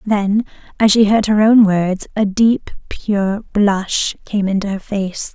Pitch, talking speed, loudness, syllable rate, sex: 205 Hz, 170 wpm, -16 LUFS, 3.6 syllables/s, female